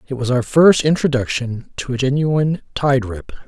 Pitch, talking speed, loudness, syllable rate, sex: 135 Hz, 175 wpm, -17 LUFS, 4.9 syllables/s, male